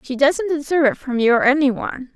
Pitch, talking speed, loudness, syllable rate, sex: 275 Hz, 250 wpm, -18 LUFS, 6.3 syllables/s, female